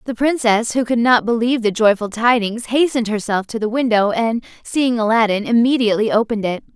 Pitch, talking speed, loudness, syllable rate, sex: 230 Hz, 180 wpm, -17 LUFS, 5.9 syllables/s, female